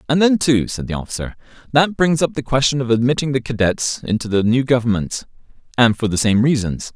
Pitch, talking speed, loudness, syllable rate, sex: 125 Hz, 200 wpm, -18 LUFS, 5.8 syllables/s, male